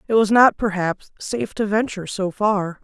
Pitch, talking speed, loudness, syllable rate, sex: 205 Hz, 190 wpm, -20 LUFS, 5.0 syllables/s, female